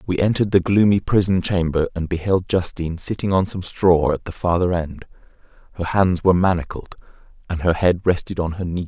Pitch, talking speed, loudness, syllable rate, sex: 90 Hz, 190 wpm, -20 LUFS, 5.7 syllables/s, male